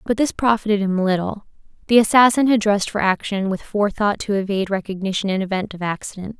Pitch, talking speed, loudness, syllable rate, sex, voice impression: 205 Hz, 190 wpm, -19 LUFS, 6.3 syllables/s, female, feminine, adult-like, tensed, slightly powerful, bright, fluent, friendly, slightly unique, lively, sharp